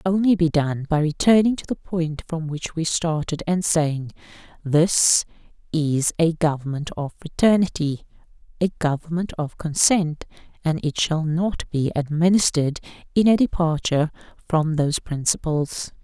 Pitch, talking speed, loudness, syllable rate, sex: 160 Hz, 140 wpm, -21 LUFS, 4.8 syllables/s, female